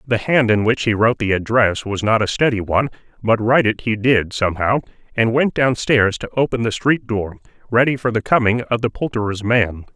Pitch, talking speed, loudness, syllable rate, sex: 115 Hz, 210 wpm, -18 LUFS, 5.5 syllables/s, male